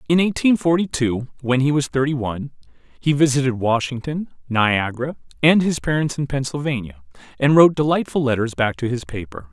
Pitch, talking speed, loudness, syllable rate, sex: 135 Hz, 165 wpm, -20 LUFS, 5.6 syllables/s, male